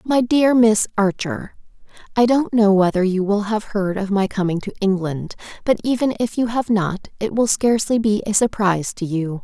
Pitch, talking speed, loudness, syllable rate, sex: 210 Hz, 190 wpm, -19 LUFS, 5.0 syllables/s, female